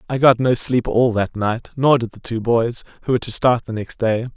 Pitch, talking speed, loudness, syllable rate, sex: 120 Hz, 260 wpm, -19 LUFS, 5.2 syllables/s, male